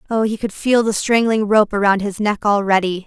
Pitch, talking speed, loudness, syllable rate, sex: 210 Hz, 215 wpm, -17 LUFS, 5.3 syllables/s, female